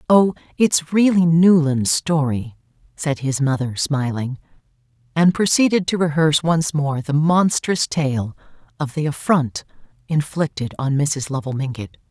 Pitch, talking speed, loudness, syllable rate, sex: 150 Hz, 130 wpm, -19 LUFS, 4.3 syllables/s, female